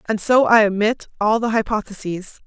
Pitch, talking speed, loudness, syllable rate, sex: 220 Hz, 170 wpm, -18 LUFS, 5.1 syllables/s, female